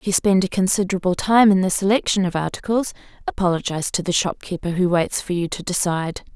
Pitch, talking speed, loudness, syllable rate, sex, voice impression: 185 Hz, 200 wpm, -20 LUFS, 6.3 syllables/s, female, very feminine, slightly young, very adult-like, very thin, tensed, slightly powerful, bright, hard, clear, fluent, slightly raspy, cute, slightly cool, intellectual, very refreshing, sincere, calm, very friendly, very reassuring, unique, elegant, wild, sweet, lively, slightly strict, slightly intense, slightly sharp